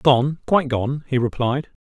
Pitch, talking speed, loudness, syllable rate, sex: 135 Hz, 165 wpm, -21 LUFS, 4.4 syllables/s, male